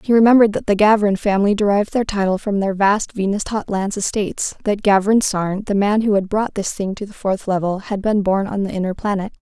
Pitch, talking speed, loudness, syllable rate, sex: 200 Hz, 230 wpm, -18 LUFS, 5.8 syllables/s, female